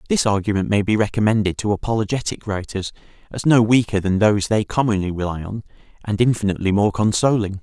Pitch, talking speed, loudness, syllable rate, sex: 105 Hz, 165 wpm, -19 LUFS, 6.2 syllables/s, male